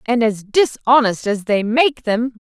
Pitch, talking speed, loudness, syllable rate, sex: 235 Hz, 175 wpm, -17 LUFS, 3.9 syllables/s, female